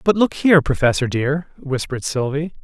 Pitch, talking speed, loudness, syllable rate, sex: 145 Hz, 160 wpm, -19 LUFS, 5.5 syllables/s, male